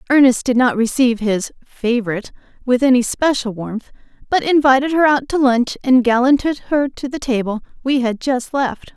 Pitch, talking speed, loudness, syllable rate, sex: 255 Hz, 175 wpm, -17 LUFS, 5.1 syllables/s, female